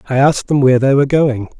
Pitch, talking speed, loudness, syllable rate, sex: 135 Hz, 265 wpm, -13 LUFS, 7.6 syllables/s, male